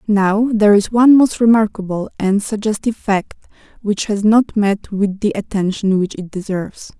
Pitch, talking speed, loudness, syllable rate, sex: 205 Hz, 165 wpm, -16 LUFS, 5.0 syllables/s, female